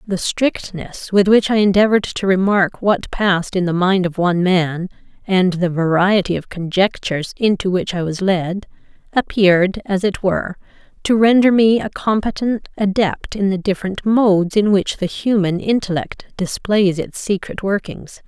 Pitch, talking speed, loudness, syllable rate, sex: 190 Hz, 160 wpm, -17 LUFS, 4.7 syllables/s, female